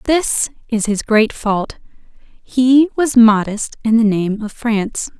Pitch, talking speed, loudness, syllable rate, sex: 230 Hz, 150 wpm, -15 LUFS, 3.6 syllables/s, female